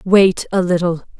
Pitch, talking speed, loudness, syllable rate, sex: 180 Hz, 150 wpm, -16 LUFS, 4.4 syllables/s, female